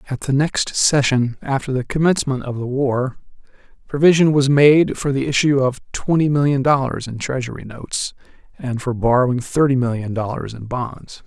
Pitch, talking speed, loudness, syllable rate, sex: 135 Hz, 165 wpm, -18 LUFS, 5.1 syllables/s, male